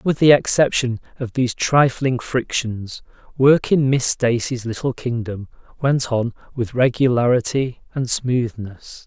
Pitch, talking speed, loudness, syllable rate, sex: 125 Hz, 125 wpm, -19 LUFS, 4.1 syllables/s, male